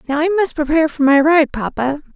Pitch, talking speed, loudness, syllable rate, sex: 300 Hz, 225 wpm, -15 LUFS, 5.9 syllables/s, female